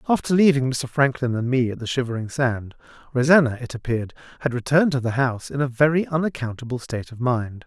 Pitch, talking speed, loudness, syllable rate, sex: 130 Hz, 195 wpm, -22 LUFS, 6.3 syllables/s, male